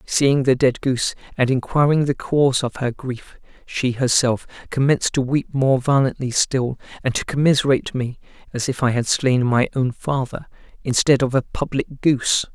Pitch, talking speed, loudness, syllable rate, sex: 130 Hz, 170 wpm, -20 LUFS, 5.0 syllables/s, male